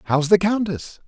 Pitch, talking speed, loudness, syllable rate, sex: 180 Hz, 165 wpm, -19 LUFS, 4.8 syllables/s, male